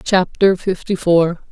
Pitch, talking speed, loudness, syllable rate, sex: 180 Hz, 120 wpm, -16 LUFS, 3.7 syllables/s, female